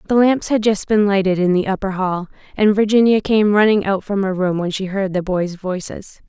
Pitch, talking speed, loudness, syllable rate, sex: 200 Hz, 230 wpm, -17 LUFS, 5.2 syllables/s, female